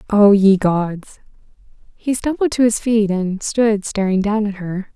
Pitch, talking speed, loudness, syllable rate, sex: 205 Hz, 170 wpm, -17 LUFS, 4.0 syllables/s, female